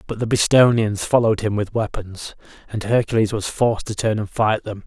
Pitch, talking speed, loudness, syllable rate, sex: 110 Hz, 195 wpm, -19 LUFS, 5.5 syllables/s, male